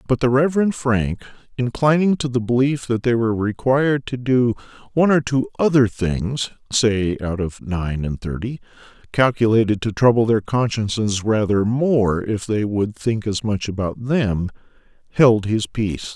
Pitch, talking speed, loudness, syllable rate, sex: 115 Hz, 160 wpm, -19 LUFS, 4.3 syllables/s, male